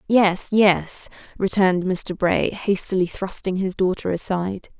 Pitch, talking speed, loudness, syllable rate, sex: 190 Hz, 125 wpm, -21 LUFS, 4.3 syllables/s, female